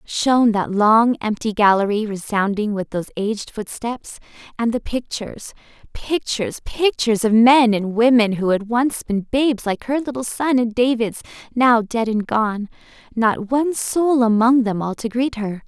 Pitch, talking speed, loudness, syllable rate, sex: 230 Hz, 150 wpm, -19 LUFS, 4.5 syllables/s, female